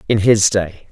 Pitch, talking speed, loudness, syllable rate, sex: 100 Hz, 195 wpm, -15 LUFS, 4.1 syllables/s, male